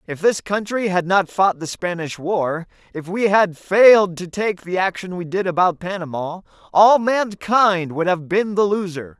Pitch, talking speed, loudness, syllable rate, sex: 185 Hz, 185 wpm, -19 LUFS, 4.4 syllables/s, male